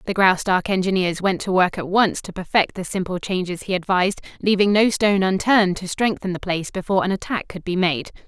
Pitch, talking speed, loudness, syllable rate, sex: 185 Hz, 210 wpm, -20 LUFS, 6.0 syllables/s, female